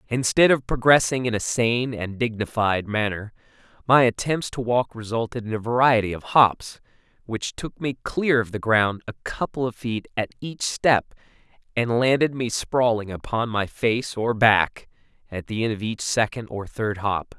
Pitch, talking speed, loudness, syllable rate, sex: 115 Hz, 175 wpm, -23 LUFS, 4.5 syllables/s, male